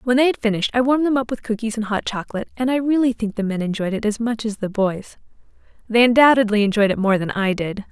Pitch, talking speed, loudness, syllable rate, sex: 225 Hz, 260 wpm, -19 LUFS, 6.8 syllables/s, female